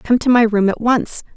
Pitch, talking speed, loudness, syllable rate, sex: 225 Hz, 265 wpm, -15 LUFS, 4.9 syllables/s, female